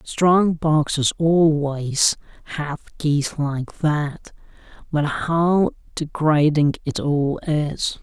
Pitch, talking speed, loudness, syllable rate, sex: 150 Hz, 95 wpm, -20 LUFS, 2.7 syllables/s, male